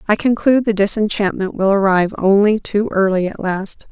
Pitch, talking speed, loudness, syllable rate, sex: 205 Hz, 170 wpm, -16 LUFS, 5.4 syllables/s, female